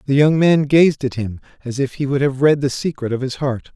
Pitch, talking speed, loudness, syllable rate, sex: 140 Hz, 270 wpm, -17 LUFS, 5.4 syllables/s, male